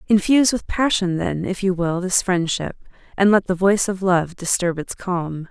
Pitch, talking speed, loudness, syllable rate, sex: 185 Hz, 195 wpm, -20 LUFS, 4.9 syllables/s, female